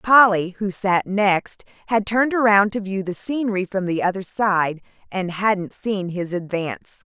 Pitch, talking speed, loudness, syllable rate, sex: 200 Hz, 170 wpm, -21 LUFS, 4.4 syllables/s, female